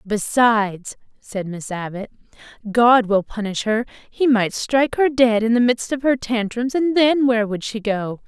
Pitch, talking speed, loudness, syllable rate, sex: 230 Hz, 180 wpm, -19 LUFS, 4.5 syllables/s, female